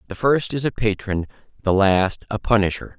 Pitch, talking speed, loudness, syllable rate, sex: 105 Hz, 180 wpm, -21 LUFS, 5.1 syllables/s, male